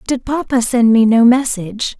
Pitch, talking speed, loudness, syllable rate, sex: 240 Hz, 180 wpm, -13 LUFS, 4.9 syllables/s, female